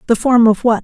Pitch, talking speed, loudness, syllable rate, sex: 230 Hz, 290 wpm, -12 LUFS, 5.7 syllables/s, female